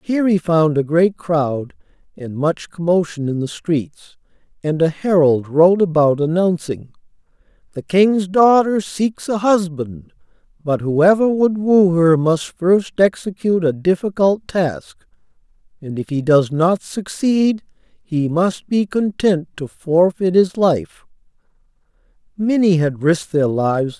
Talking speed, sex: 145 wpm, male